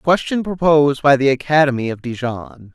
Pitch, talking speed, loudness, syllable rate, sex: 140 Hz, 155 wpm, -16 LUFS, 5.2 syllables/s, male